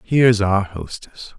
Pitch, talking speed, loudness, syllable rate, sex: 105 Hz, 130 wpm, -17 LUFS, 3.9 syllables/s, male